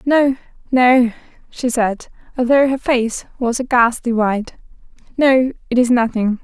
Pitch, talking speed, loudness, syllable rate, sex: 245 Hz, 140 wpm, -16 LUFS, 4.3 syllables/s, female